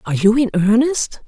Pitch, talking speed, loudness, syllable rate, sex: 230 Hz, 190 wpm, -16 LUFS, 5.6 syllables/s, female